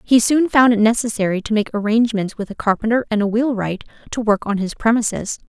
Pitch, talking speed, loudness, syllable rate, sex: 220 Hz, 195 wpm, -18 LUFS, 5.8 syllables/s, female